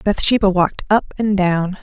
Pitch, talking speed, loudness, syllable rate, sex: 195 Hz, 165 wpm, -17 LUFS, 5.2 syllables/s, female